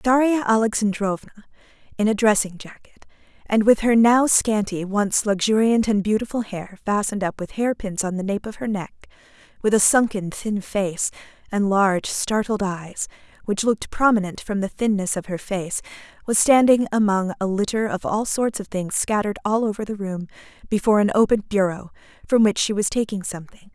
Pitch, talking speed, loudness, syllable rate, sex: 210 Hz, 175 wpm, -21 LUFS, 5.3 syllables/s, female